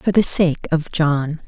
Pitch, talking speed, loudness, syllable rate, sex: 160 Hz, 205 wpm, -17 LUFS, 3.6 syllables/s, female